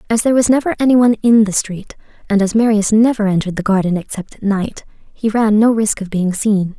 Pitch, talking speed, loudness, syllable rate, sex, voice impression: 210 Hz, 230 wpm, -15 LUFS, 5.9 syllables/s, female, feminine, slightly young, clear, fluent, intellectual, calm, elegant, slightly sweet, sharp